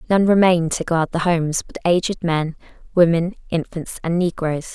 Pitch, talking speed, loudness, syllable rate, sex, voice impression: 170 Hz, 165 wpm, -19 LUFS, 5.1 syllables/s, female, feminine, slightly adult-like, slightly calm, slightly unique, slightly elegant